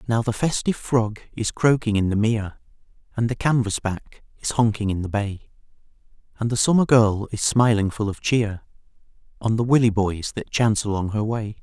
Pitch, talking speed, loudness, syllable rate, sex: 110 Hz, 175 wpm, -22 LUFS, 5.2 syllables/s, male